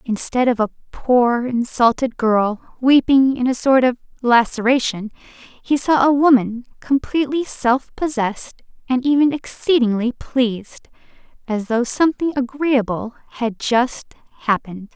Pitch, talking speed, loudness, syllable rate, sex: 250 Hz, 120 wpm, -18 LUFS, 4.3 syllables/s, female